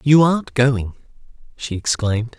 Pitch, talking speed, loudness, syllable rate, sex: 125 Hz, 125 wpm, -18 LUFS, 4.7 syllables/s, male